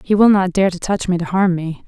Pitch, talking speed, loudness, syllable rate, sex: 185 Hz, 320 wpm, -16 LUFS, 5.7 syllables/s, female